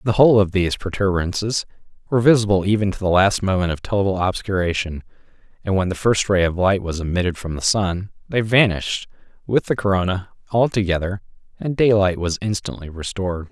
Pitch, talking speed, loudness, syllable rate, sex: 95 Hz, 170 wpm, -20 LUFS, 6.0 syllables/s, male